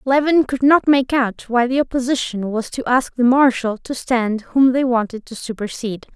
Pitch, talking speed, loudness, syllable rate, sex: 250 Hz, 195 wpm, -18 LUFS, 4.8 syllables/s, female